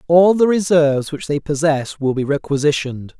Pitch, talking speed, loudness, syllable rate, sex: 150 Hz, 170 wpm, -17 LUFS, 5.3 syllables/s, male